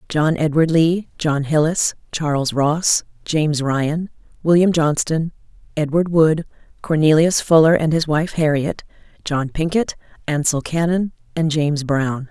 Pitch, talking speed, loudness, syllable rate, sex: 155 Hz, 125 wpm, -18 LUFS, 4.3 syllables/s, female